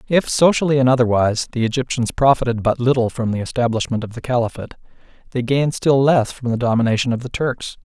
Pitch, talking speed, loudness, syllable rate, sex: 125 Hz, 190 wpm, -18 LUFS, 6.5 syllables/s, male